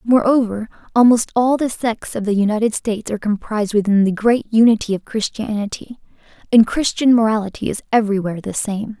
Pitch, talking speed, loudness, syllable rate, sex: 220 Hz, 160 wpm, -17 LUFS, 5.9 syllables/s, female